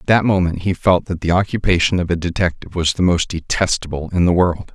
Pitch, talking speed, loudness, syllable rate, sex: 90 Hz, 230 wpm, -17 LUFS, 6.0 syllables/s, male